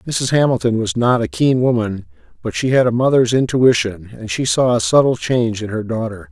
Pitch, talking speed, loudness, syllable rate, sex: 120 Hz, 210 wpm, -16 LUFS, 5.3 syllables/s, male